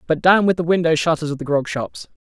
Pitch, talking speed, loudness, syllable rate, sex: 160 Hz, 270 wpm, -18 LUFS, 6.1 syllables/s, male